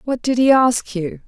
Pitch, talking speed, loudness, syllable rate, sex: 235 Hz, 235 wpm, -17 LUFS, 4.5 syllables/s, female